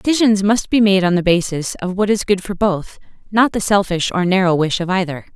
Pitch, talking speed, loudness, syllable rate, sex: 190 Hz, 235 wpm, -16 LUFS, 5.5 syllables/s, female